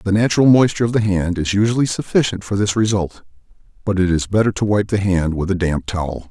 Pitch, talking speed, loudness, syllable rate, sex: 100 Hz, 230 wpm, -17 LUFS, 6.2 syllables/s, male